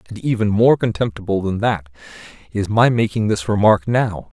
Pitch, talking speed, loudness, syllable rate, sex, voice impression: 105 Hz, 165 wpm, -18 LUFS, 5.1 syllables/s, male, masculine, adult-like, tensed, powerful, clear, slightly fluent, cool, intellectual, calm, friendly, wild, lively, slightly strict